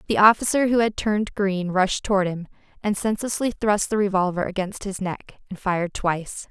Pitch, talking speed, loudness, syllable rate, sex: 200 Hz, 185 wpm, -23 LUFS, 5.5 syllables/s, female